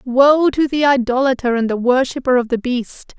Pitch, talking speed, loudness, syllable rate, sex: 255 Hz, 190 wpm, -16 LUFS, 4.9 syllables/s, female